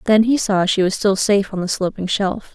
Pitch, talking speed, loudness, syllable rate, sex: 200 Hz, 260 wpm, -18 LUFS, 5.4 syllables/s, female